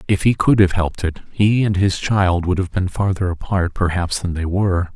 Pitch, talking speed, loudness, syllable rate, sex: 95 Hz, 230 wpm, -18 LUFS, 5.2 syllables/s, male